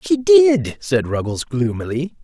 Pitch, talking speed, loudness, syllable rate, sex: 145 Hz, 135 wpm, -17 LUFS, 3.9 syllables/s, male